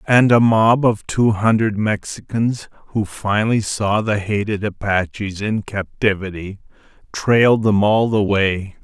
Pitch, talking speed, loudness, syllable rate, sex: 105 Hz, 135 wpm, -18 LUFS, 4.1 syllables/s, male